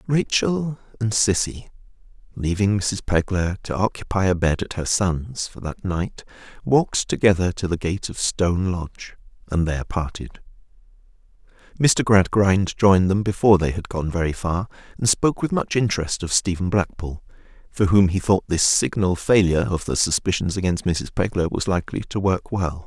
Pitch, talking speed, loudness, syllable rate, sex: 95 Hz, 165 wpm, -21 LUFS, 5.0 syllables/s, male